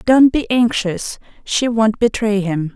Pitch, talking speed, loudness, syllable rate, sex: 220 Hz, 155 wpm, -16 LUFS, 3.7 syllables/s, female